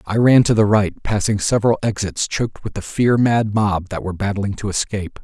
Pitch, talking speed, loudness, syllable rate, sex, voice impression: 105 Hz, 220 wpm, -18 LUFS, 5.5 syllables/s, male, masculine, adult-like, slightly thick, cool, sincere, friendly